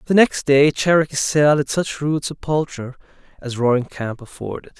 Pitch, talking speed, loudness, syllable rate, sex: 145 Hz, 165 wpm, -19 LUFS, 5.1 syllables/s, male